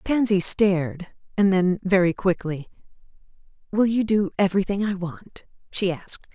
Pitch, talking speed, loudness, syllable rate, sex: 190 Hz, 130 wpm, -22 LUFS, 4.7 syllables/s, female